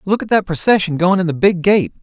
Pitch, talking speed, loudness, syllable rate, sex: 185 Hz, 265 wpm, -15 LUFS, 5.9 syllables/s, male